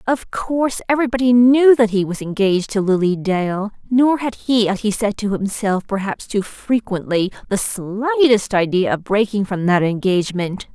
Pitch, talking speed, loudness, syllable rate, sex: 210 Hz, 170 wpm, -18 LUFS, 4.7 syllables/s, female